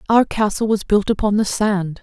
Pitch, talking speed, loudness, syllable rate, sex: 205 Hz, 205 wpm, -18 LUFS, 4.9 syllables/s, female